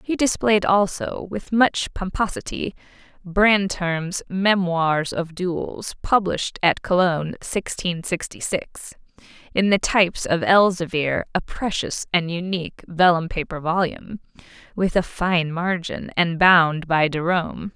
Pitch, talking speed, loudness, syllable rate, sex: 180 Hz, 115 wpm, -21 LUFS, 4.1 syllables/s, female